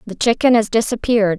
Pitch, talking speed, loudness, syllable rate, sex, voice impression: 220 Hz, 175 wpm, -16 LUFS, 6.1 syllables/s, female, feminine, adult-like, tensed, powerful, clear, fluent, nasal, intellectual, calm, reassuring, elegant, lively, slightly strict